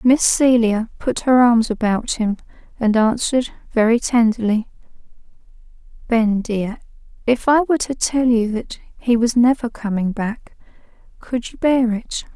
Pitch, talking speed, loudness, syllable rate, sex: 235 Hz, 135 wpm, -18 LUFS, 4.4 syllables/s, female